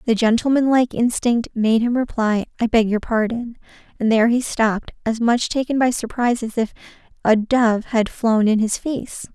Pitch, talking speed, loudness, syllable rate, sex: 230 Hz, 175 wpm, -19 LUFS, 5.1 syllables/s, female